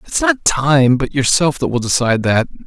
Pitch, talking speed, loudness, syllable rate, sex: 140 Hz, 205 wpm, -15 LUFS, 5.1 syllables/s, male